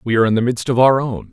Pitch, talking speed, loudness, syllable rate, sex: 120 Hz, 365 wpm, -16 LUFS, 7.4 syllables/s, male